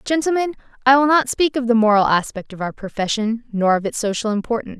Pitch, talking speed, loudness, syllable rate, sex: 235 Hz, 215 wpm, -18 LUFS, 6.3 syllables/s, female